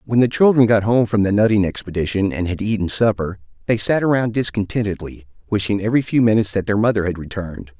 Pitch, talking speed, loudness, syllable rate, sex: 105 Hz, 200 wpm, -18 LUFS, 6.4 syllables/s, male